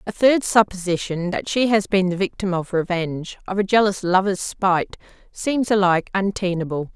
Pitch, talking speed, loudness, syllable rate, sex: 190 Hz, 145 wpm, -20 LUFS, 5.2 syllables/s, female